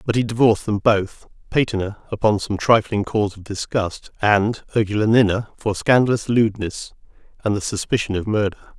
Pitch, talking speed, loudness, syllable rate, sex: 105 Hz, 150 wpm, -20 LUFS, 5.5 syllables/s, male